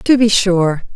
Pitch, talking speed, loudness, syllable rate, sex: 200 Hz, 190 wpm, -13 LUFS, 3.7 syllables/s, female